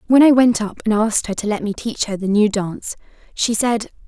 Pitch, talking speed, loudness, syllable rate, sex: 215 Hz, 250 wpm, -18 LUFS, 5.7 syllables/s, female